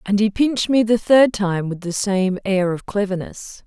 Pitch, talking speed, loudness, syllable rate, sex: 205 Hz, 215 wpm, -19 LUFS, 4.6 syllables/s, female